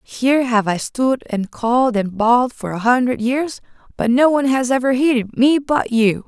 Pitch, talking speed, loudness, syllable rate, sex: 245 Hz, 200 wpm, -17 LUFS, 4.8 syllables/s, female